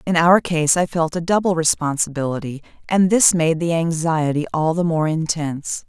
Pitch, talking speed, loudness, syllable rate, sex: 165 Hz, 175 wpm, -18 LUFS, 5.0 syllables/s, female